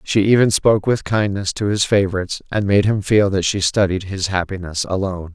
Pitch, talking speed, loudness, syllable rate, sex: 100 Hz, 200 wpm, -18 LUFS, 5.7 syllables/s, male